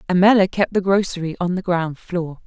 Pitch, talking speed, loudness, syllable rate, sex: 180 Hz, 195 wpm, -19 LUFS, 5.4 syllables/s, female